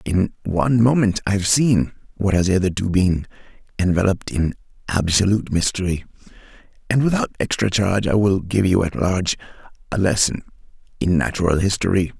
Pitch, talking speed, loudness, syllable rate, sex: 100 Hz, 140 wpm, -19 LUFS, 5.7 syllables/s, male